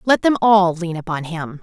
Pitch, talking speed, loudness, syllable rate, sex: 185 Hz, 220 wpm, -17 LUFS, 4.6 syllables/s, female